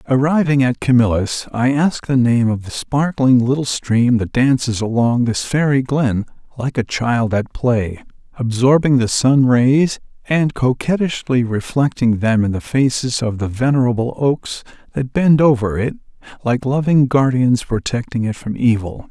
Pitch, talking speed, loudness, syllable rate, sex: 125 Hz, 155 wpm, -16 LUFS, 4.4 syllables/s, male